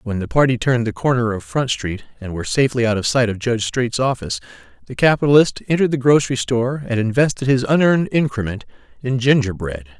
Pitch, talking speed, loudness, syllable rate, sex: 120 Hz, 190 wpm, -18 LUFS, 6.6 syllables/s, male